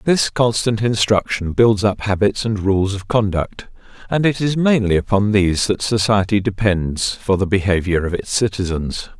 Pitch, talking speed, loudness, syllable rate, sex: 105 Hz, 165 wpm, -18 LUFS, 4.7 syllables/s, male